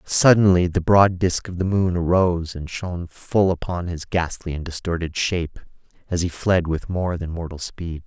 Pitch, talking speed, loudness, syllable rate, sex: 90 Hz, 185 wpm, -21 LUFS, 4.8 syllables/s, male